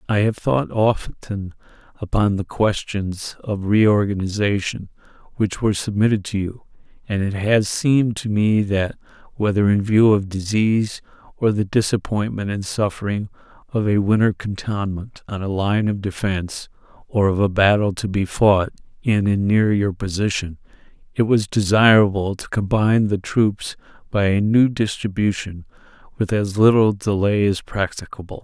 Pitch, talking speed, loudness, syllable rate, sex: 105 Hz, 145 wpm, -20 LUFS, 4.6 syllables/s, male